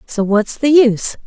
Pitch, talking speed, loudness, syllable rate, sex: 240 Hz, 190 wpm, -14 LUFS, 4.6 syllables/s, female